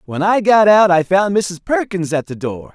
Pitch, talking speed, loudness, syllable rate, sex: 185 Hz, 240 wpm, -15 LUFS, 4.6 syllables/s, male